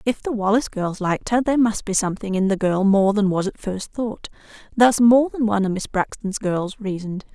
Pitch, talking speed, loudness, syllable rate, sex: 210 Hz, 220 wpm, -20 LUFS, 5.7 syllables/s, female